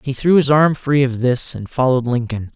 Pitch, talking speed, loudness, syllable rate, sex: 130 Hz, 235 wpm, -16 LUFS, 5.3 syllables/s, male